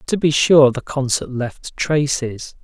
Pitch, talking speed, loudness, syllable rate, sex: 140 Hz, 160 wpm, -18 LUFS, 3.7 syllables/s, male